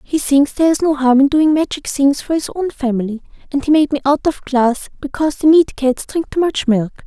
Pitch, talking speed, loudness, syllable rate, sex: 285 Hz, 240 wpm, -15 LUFS, 5.4 syllables/s, female